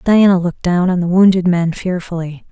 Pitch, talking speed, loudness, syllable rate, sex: 180 Hz, 190 wpm, -14 LUFS, 5.5 syllables/s, female